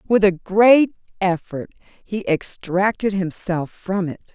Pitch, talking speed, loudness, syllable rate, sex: 190 Hz, 125 wpm, -20 LUFS, 3.5 syllables/s, female